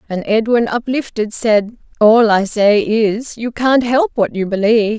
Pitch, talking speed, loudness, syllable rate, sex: 220 Hz, 155 wpm, -15 LUFS, 4.2 syllables/s, female